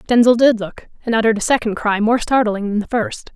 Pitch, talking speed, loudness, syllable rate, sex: 225 Hz, 230 wpm, -17 LUFS, 5.9 syllables/s, female